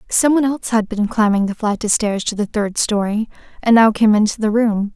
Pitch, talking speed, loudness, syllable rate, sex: 215 Hz, 240 wpm, -17 LUFS, 5.6 syllables/s, female